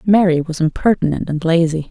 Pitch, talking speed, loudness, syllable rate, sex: 170 Hz, 160 wpm, -16 LUFS, 5.5 syllables/s, female